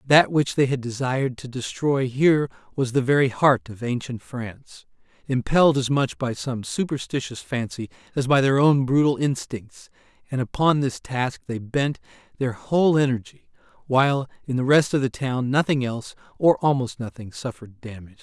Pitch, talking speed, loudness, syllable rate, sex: 130 Hz, 170 wpm, -23 LUFS, 5.1 syllables/s, male